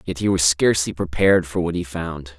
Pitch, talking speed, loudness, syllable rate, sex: 85 Hz, 225 wpm, -20 LUFS, 5.7 syllables/s, male